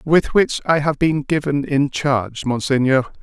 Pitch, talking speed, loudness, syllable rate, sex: 140 Hz, 165 wpm, -18 LUFS, 4.5 syllables/s, male